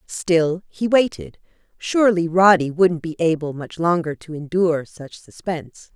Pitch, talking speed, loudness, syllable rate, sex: 170 Hz, 140 wpm, -19 LUFS, 4.5 syllables/s, female